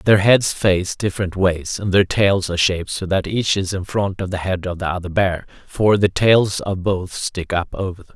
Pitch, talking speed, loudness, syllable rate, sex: 95 Hz, 235 wpm, -19 LUFS, 4.8 syllables/s, male